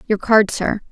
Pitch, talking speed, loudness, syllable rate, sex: 210 Hz, 195 wpm, -16 LUFS, 4.4 syllables/s, female